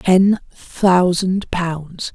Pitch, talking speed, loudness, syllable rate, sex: 180 Hz, 85 wpm, -17 LUFS, 2.0 syllables/s, female